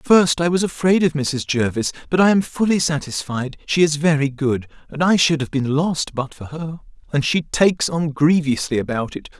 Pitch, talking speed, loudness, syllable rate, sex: 150 Hz, 210 wpm, -19 LUFS, 5.0 syllables/s, male